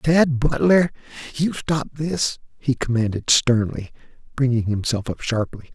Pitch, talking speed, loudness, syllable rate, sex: 130 Hz, 125 wpm, -21 LUFS, 4.1 syllables/s, male